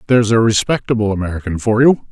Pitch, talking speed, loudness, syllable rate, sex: 110 Hz, 170 wpm, -15 LUFS, 6.7 syllables/s, male